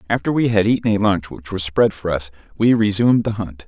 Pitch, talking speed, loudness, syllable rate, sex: 100 Hz, 245 wpm, -18 LUFS, 5.9 syllables/s, male